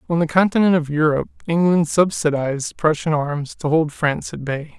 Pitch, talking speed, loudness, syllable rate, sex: 155 Hz, 175 wpm, -19 LUFS, 5.4 syllables/s, male